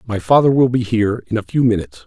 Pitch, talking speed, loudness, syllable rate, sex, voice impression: 115 Hz, 260 wpm, -16 LUFS, 6.7 syllables/s, male, very masculine, slightly old, thick, powerful, cool, slightly wild